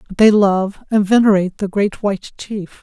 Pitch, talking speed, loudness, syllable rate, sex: 200 Hz, 190 wpm, -16 LUFS, 5.2 syllables/s, female